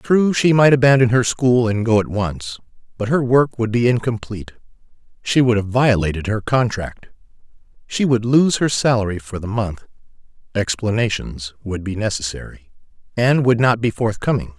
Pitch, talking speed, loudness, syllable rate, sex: 115 Hz, 160 wpm, -18 LUFS, 5.0 syllables/s, male